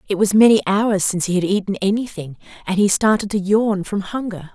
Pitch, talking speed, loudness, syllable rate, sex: 200 Hz, 210 wpm, -18 LUFS, 5.7 syllables/s, female